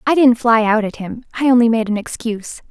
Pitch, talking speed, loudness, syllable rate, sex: 230 Hz, 220 wpm, -16 LUFS, 5.8 syllables/s, female